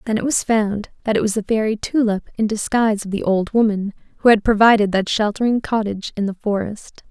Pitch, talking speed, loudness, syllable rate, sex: 215 Hz, 210 wpm, -19 LUFS, 5.9 syllables/s, female